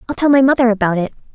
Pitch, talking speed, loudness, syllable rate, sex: 235 Hz, 270 wpm, -14 LUFS, 8.0 syllables/s, female